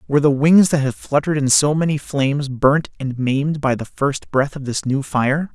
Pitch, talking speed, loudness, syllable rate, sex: 140 Hz, 225 wpm, -18 LUFS, 5.1 syllables/s, male